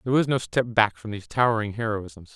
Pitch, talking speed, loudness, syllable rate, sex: 110 Hz, 230 wpm, -24 LUFS, 6.2 syllables/s, male